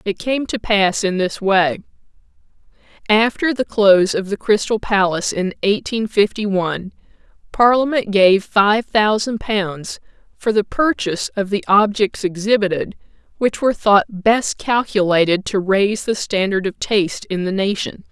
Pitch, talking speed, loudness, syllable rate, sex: 205 Hz, 145 wpm, -17 LUFS, 4.6 syllables/s, female